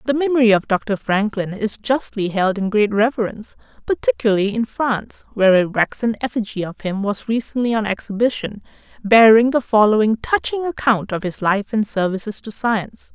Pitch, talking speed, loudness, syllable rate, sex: 220 Hz, 165 wpm, -18 LUFS, 5.4 syllables/s, female